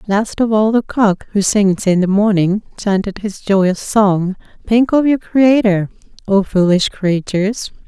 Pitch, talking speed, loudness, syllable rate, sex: 205 Hz, 150 wpm, -15 LUFS, 4.0 syllables/s, female